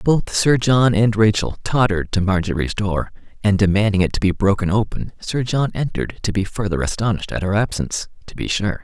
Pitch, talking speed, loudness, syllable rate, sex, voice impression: 105 Hz, 195 wpm, -19 LUFS, 5.7 syllables/s, male, very masculine, very middle-aged, very thick, very relaxed, very powerful, bright, slightly hard, very muffled, very fluent, slightly raspy, very cool, intellectual, sincere, very calm, very mature, very friendly, very reassuring, very unique, elegant, wild, very sweet, lively, kind, slightly modest